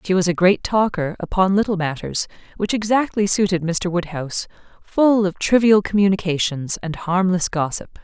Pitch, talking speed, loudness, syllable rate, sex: 190 Hz, 150 wpm, -19 LUFS, 5.0 syllables/s, female